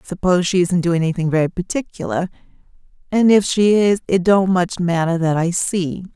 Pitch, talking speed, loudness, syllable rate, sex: 180 Hz, 185 wpm, -17 LUFS, 5.5 syllables/s, female